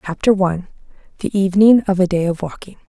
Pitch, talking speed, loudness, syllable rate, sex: 190 Hz, 160 wpm, -16 LUFS, 6.7 syllables/s, female